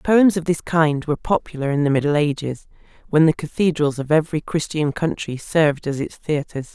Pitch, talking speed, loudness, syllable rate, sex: 150 Hz, 185 wpm, -20 LUFS, 5.4 syllables/s, female